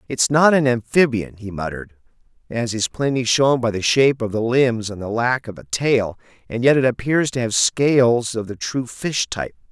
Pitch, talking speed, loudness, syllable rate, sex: 120 Hz, 210 wpm, -19 LUFS, 5.0 syllables/s, male